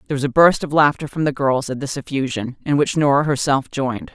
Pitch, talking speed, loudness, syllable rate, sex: 140 Hz, 245 wpm, -19 LUFS, 6.1 syllables/s, female